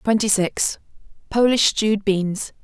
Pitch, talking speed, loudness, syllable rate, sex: 210 Hz, 90 wpm, -19 LUFS, 4.1 syllables/s, female